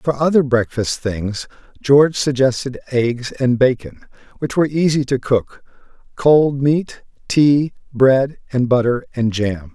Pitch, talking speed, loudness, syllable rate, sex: 130 Hz, 135 wpm, -17 LUFS, 4.1 syllables/s, male